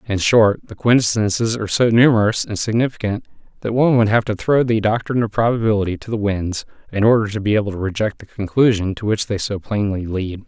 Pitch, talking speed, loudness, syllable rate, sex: 105 Hz, 210 wpm, -18 LUFS, 6.0 syllables/s, male